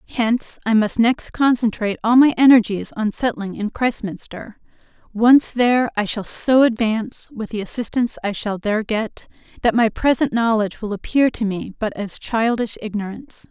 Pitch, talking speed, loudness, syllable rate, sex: 225 Hz, 165 wpm, -19 LUFS, 5.1 syllables/s, female